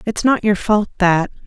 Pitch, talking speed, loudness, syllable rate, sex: 200 Hz, 205 wpm, -16 LUFS, 4.7 syllables/s, female